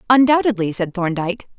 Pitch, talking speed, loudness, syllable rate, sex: 210 Hz, 115 wpm, -18 LUFS, 6.1 syllables/s, female